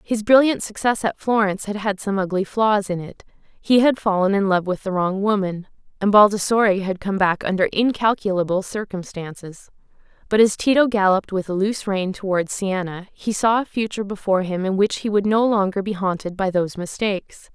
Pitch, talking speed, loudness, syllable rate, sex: 200 Hz, 190 wpm, -20 LUFS, 5.5 syllables/s, female